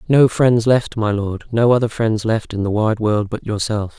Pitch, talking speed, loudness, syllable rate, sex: 110 Hz, 225 wpm, -17 LUFS, 4.6 syllables/s, male